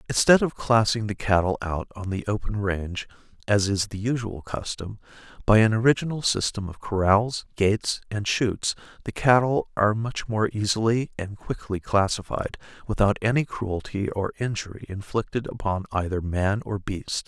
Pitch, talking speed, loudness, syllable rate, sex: 105 Hz, 155 wpm, -25 LUFS, 4.9 syllables/s, male